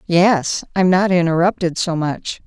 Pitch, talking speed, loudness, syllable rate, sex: 175 Hz, 145 wpm, -17 LUFS, 4.0 syllables/s, female